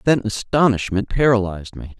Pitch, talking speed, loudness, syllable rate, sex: 110 Hz, 120 wpm, -19 LUFS, 5.4 syllables/s, male